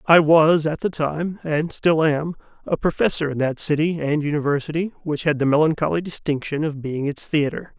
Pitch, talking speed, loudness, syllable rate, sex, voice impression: 155 Hz, 185 wpm, -21 LUFS, 5.1 syllables/s, male, very masculine, very adult-like, old, slightly thick, relaxed, slightly powerful, slightly bright, slightly soft, slightly muffled, slightly fluent, slightly raspy, slightly cool, intellectual, slightly refreshing, very sincere, calm, slightly mature, slightly friendly, slightly reassuring, very unique, slightly elegant, wild, slightly sweet, lively, kind, slightly intense, slightly modest